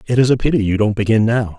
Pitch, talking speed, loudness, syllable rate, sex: 110 Hz, 300 wpm, -16 LUFS, 7.0 syllables/s, male